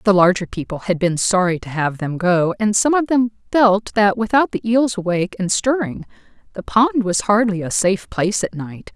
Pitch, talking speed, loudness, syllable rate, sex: 195 Hz, 210 wpm, -18 LUFS, 5.1 syllables/s, female